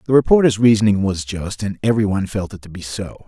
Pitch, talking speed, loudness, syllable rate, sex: 105 Hz, 240 wpm, -18 LUFS, 6.7 syllables/s, male